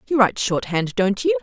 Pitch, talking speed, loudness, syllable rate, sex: 240 Hz, 210 wpm, -20 LUFS, 5.7 syllables/s, female